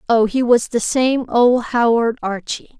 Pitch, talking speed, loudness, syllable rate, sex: 235 Hz, 170 wpm, -17 LUFS, 4.1 syllables/s, female